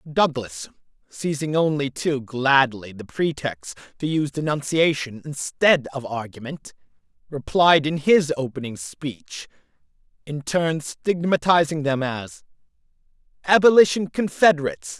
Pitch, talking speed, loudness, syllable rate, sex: 150 Hz, 100 wpm, -21 LUFS, 4.2 syllables/s, male